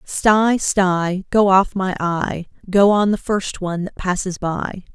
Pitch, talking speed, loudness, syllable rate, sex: 190 Hz, 170 wpm, -18 LUFS, 3.6 syllables/s, female